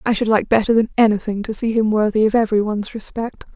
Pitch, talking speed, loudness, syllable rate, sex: 215 Hz, 235 wpm, -18 LUFS, 6.7 syllables/s, female